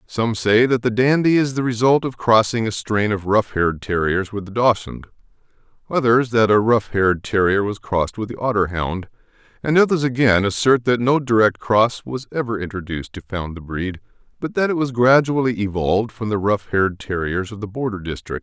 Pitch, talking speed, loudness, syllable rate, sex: 110 Hz, 195 wpm, -19 LUFS, 5.3 syllables/s, male